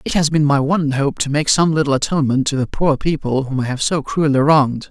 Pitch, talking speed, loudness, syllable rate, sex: 145 Hz, 255 wpm, -17 LUFS, 6.0 syllables/s, male